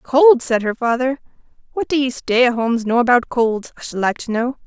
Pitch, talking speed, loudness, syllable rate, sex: 245 Hz, 230 wpm, -17 LUFS, 5.3 syllables/s, female